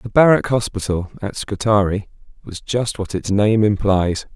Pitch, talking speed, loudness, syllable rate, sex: 105 Hz, 150 wpm, -18 LUFS, 4.5 syllables/s, male